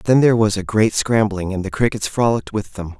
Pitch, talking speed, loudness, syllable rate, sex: 105 Hz, 240 wpm, -18 LUFS, 6.0 syllables/s, male